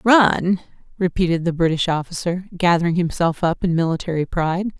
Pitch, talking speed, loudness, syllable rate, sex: 175 Hz, 140 wpm, -20 LUFS, 5.5 syllables/s, female